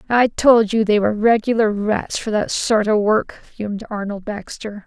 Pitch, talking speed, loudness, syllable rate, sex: 215 Hz, 185 wpm, -18 LUFS, 4.6 syllables/s, female